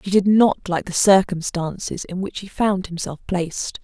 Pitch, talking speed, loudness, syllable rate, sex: 185 Hz, 205 wpm, -20 LUFS, 4.9 syllables/s, female